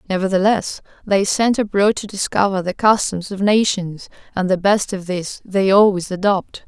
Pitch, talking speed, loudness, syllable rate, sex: 195 Hz, 160 wpm, -18 LUFS, 4.9 syllables/s, female